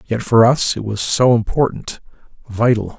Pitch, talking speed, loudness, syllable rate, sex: 115 Hz, 160 wpm, -16 LUFS, 4.6 syllables/s, male